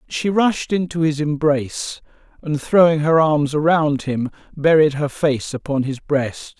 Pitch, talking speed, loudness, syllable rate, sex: 150 Hz, 155 wpm, -18 LUFS, 4.2 syllables/s, male